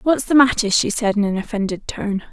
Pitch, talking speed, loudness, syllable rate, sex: 220 Hz, 235 wpm, -18 LUFS, 5.5 syllables/s, female